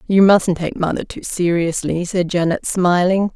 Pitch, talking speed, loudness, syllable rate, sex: 180 Hz, 160 wpm, -17 LUFS, 4.4 syllables/s, female